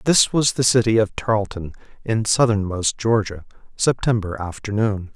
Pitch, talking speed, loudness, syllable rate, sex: 110 Hz, 130 wpm, -20 LUFS, 4.8 syllables/s, male